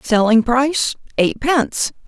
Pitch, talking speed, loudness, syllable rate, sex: 255 Hz, 85 wpm, -17 LUFS, 4.2 syllables/s, female